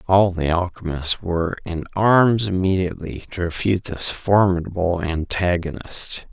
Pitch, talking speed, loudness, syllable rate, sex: 90 Hz, 115 wpm, -20 LUFS, 4.6 syllables/s, male